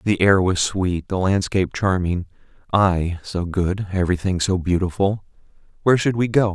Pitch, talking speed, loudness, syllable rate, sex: 95 Hz, 130 wpm, -20 LUFS, 4.9 syllables/s, male